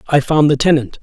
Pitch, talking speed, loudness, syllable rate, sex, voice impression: 145 Hz, 235 wpm, -13 LUFS, 5.8 syllables/s, male, masculine, slightly young, very adult-like, thick, slightly tensed, slightly powerful, slightly dark, soft, slightly muffled, fluent, cool, intellectual, slightly refreshing, very sincere, very calm, mature, friendly, very reassuring, unique, elegant, slightly wild, sweet, slightly lively, kind, modest, slightly light